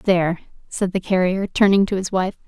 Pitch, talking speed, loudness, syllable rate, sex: 185 Hz, 195 wpm, -19 LUFS, 5.3 syllables/s, female